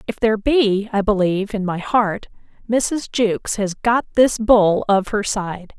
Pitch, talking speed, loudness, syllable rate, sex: 210 Hz, 175 wpm, -18 LUFS, 4.2 syllables/s, female